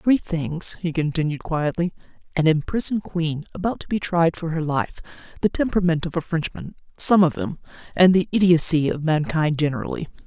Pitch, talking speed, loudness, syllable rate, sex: 165 Hz, 160 wpm, -21 LUFS, 5.5 syllables/s, female